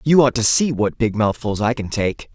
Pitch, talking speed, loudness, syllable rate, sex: 115 Hz, 255 wpm, -18 LUFS, 4.9 syllables/s, male